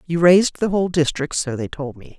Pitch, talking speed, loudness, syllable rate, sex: 160 Hz, 250 wpm, -19 LUFS, 5.9 syllables/s, female